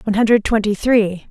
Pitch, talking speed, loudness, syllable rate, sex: 215 Hz, 185 wpm, -16 LUFS, 5.9 syllables/s, female